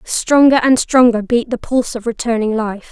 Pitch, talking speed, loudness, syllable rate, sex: 235 Hz, 185 wpm, -14 LUFS, 5.0 syllables/s, female